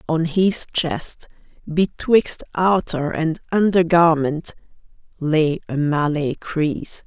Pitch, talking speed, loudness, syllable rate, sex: 160 Hz, 100 wpm, -20 LUFS, 3.3 syllables/s, female